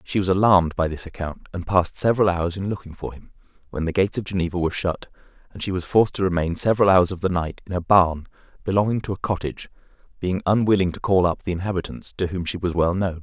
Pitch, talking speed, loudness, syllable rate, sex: 90 Hz, 235 wpm, -22 LUFS, 6.7 syllables/s, male